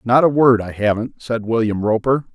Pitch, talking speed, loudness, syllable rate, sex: 115 Hz, 205 wpm, -17 LUFS, 5.1 syllables/s, male